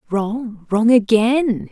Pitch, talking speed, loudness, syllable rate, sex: 225 Hz, 105 wpm, -17 LUFS, 2.7 syllables/s, female